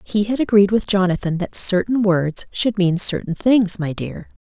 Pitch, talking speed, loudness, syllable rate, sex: 195 Hz, 190 wpm, -18 LUFS, 4.5 syllables/s, female